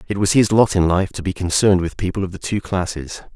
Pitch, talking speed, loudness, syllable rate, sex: 95 Hz, 270 wpm, -18 LUFS, 6.2 syllables/s, male